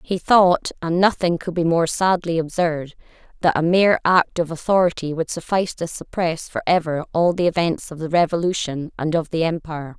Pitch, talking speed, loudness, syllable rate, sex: 170 Hz, 180 wpm, -20 LUFS, 5.3 syllables/s, female